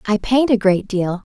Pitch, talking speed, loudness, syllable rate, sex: 210 Hz, 225 wpm, -17 LUFS, 4.4 syllables/s, female